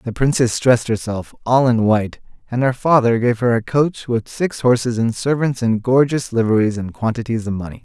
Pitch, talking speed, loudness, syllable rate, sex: 120 Hz, 200 wpm, -18 LUFS, 5.3 syllables/s, male